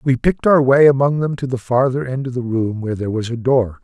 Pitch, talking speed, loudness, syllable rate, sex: 130 Hz, 280 wpm, -17 LUFS, 6.1 syllables/s, male